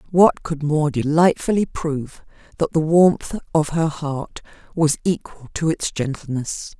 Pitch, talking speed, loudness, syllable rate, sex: 155 Hz, 140 wpm, -20 LUFS, 4.1 syllables/s, female